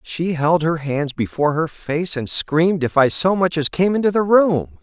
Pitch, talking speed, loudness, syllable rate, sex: 160 Hz, 225 wpm, -18 LUFS, 4.7 syllables/s, male